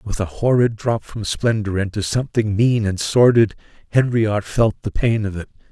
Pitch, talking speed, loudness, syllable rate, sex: 110 Hz, 180 wpm, -19 LUFS, 4.9 syllables/s, male